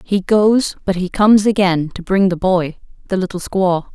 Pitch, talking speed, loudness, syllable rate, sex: 190 Hz, 200 wpm, -16 LUFS, 4.7 syllables/s, female